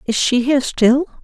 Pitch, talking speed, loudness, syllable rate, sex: 260 Hz, 195 wpm, -16 LUFS, 5.1 syllables/s, female